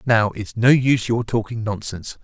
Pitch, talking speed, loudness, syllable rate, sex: 115 Hz, 190 wpm, -20 LUFS, 5.2 syllables/s, male